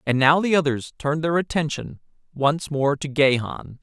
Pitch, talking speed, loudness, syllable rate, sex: 150 Hz, 170 wpm, -22 LUFS, 4.8 syllables/s, male